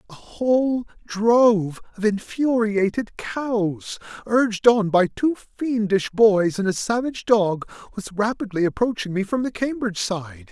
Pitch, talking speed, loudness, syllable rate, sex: 215 Hz, 135 wpm, -21 LUFS, 4.3 syllables/s, male